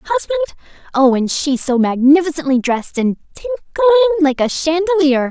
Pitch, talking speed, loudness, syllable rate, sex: 315 Hz, 135 wpm, -15 LUFS, 5.7 syllables/s, female